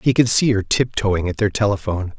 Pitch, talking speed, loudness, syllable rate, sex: 105 Hz, 220 wpm, -19 LUFS, 5.8 syllables/s, male